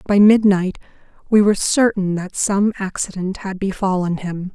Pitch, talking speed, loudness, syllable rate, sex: 195 Hz, 145 wpm, -18 LUFS, 4.7 syllables/s, female